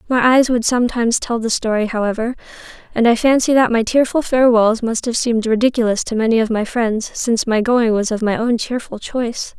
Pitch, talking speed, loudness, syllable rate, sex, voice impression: 230 Hz, 205 wpm, -16 LUFS, 5.8 syllables/s, female, very feminine, young, very thin, slightly relaxed, slightly weak, bright, soft, very clear, very fluent, very cute, intellectual, very refreshing, sincere, calm, very friendly, reassuring, very unique, very elegant, slightly wild, very sweet, lively, kind, modest, light